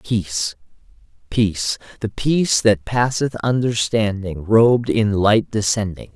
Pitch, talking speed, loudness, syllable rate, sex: 110 Hz, 100 wpm, -19 LUFS, 4.3 syllables/s, male